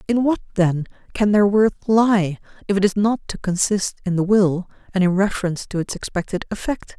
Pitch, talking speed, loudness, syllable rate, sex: 195 Hz, 195 wpm, -20 LUFS, 5.4 syllables/s, female